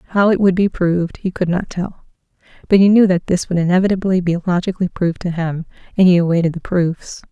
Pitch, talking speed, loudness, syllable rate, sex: 180 Hz, 215 wpm, -16 LUFS, 6.3 syllables/s, female